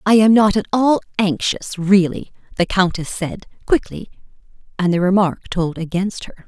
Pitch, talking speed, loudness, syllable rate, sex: 190 Hz, 160 wpm, -17 LUFS, 4.7 syllables/s, female